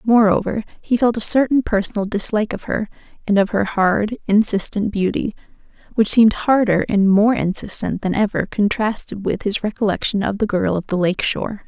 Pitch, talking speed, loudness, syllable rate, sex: 210 Hz, 175 wpm, -18 LUFS, 5.3 syllables/s, female